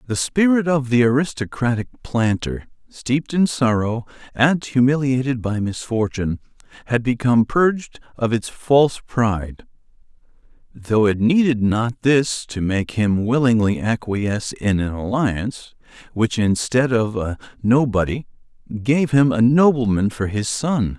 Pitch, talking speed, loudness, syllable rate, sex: 120 Hz, 125 wpm, -19 LUFS, 4.5 syllables/s, male